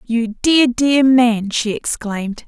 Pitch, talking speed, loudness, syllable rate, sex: 235 Hz, 145 wpm, -16 LUFS, 3.4 syllables/s, female